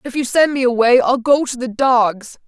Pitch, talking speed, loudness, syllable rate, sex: 250 Hz, 245 wpm, -15 LUFS, 4.7 syllables/s, female